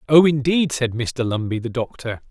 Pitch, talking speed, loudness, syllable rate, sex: 130 Hz, 180 wpm, -20 LUFS, 4.9 syllables/s, male